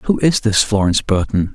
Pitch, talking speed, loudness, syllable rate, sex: 110 Hz, 195 wpm, -16 LUFS, 5.3 syllables/s, male